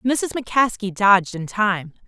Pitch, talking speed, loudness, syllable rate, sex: 210 Hz, 145 wpm, -20 LUFS, 4.7 syllables/s, female